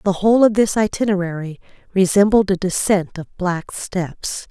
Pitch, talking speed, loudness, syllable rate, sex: 190 Hz, 145 wpm, -18 LUFS, 4.7 syllables/s, female